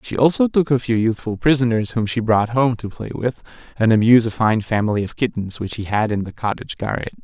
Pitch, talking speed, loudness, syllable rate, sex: 115 Hz, 230 wpm, -19 LUFS, 6.0 syllables/s, male